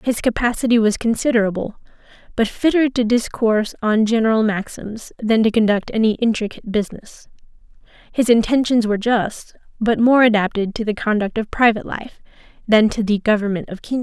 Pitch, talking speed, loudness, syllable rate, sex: 220 Hz, 155 wpm, -18 LUFS, 5.7 syllables/s, female